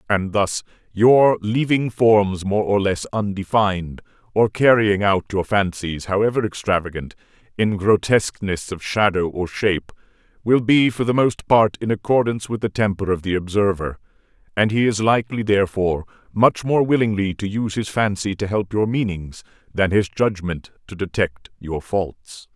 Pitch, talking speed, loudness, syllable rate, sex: 105 Hz, 155 wpm, -20 LUFS, 4.8 syllables/s, male